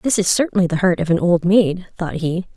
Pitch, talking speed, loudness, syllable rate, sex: 180 Hz, 260 wpm, -18 LUFS, 5.4 syllables/s, female